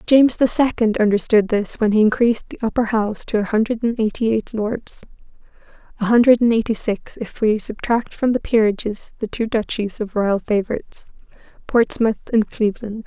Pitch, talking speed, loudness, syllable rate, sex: 220 Hz, 175 wpm, -19 LUFS, 5.4 syllables/s, female